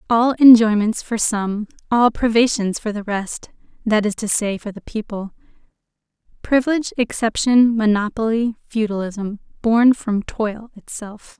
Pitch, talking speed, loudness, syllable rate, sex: 220 Hz, 125 wpm, -18 LUFS, 4.4 syllables/s, female